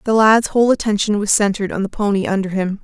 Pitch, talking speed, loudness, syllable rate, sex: 205 Hz, 235 wpm, -16 LUFS, 6.6 syllables/s, female